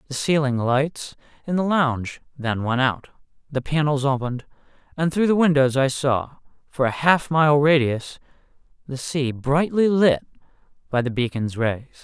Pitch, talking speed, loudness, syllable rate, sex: 140 Hz, 155 wpm, -21 LUFS, 4.6 syllables/s, male